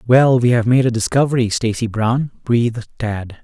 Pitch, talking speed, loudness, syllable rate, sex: 120 Hz, 175 wpm, -17 LUFS, 4.9 syllables/s, male